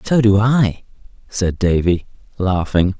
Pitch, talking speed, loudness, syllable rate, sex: 100 Hz, 120 wpm, -17 LUFS, 3.8 syllables/s, male